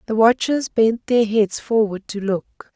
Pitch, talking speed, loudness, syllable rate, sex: 220 Hz, 175 wpm, -19 LUFS, 3.9 syllables/s, female